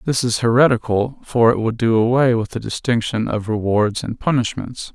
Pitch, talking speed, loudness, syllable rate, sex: 115 Hz, 180 wpm, -18 LUFS, 5.0 syllables/s, male